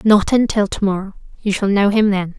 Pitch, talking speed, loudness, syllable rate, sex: 200 Hz, 200 wpm, -17 LUFS, 5.5 syllables/s, female